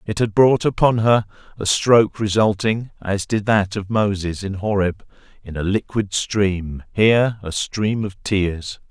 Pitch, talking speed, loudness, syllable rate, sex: 105 Hz, 155 wpm, -19 LUFS, 4.1 syllables/s, male